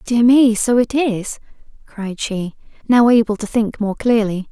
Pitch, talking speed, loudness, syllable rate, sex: 225 Hz, 175 wpm, -16 LUFS, 4.1 syllables/s, female